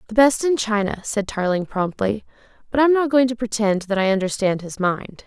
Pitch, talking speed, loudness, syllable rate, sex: 215 Hz, 205 wpm, -20 LUFS, 5.3 syllables/s, female